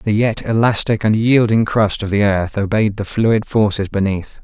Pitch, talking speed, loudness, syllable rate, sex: 105 Hz, 190 wpm, -16 LUFS, 4.6 syllables/s, male